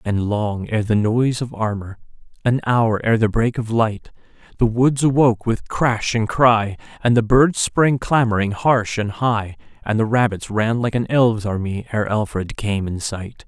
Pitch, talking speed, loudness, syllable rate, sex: 110 Hz, 185 wpm, -19 LUFS, 4.4 syllables/s, male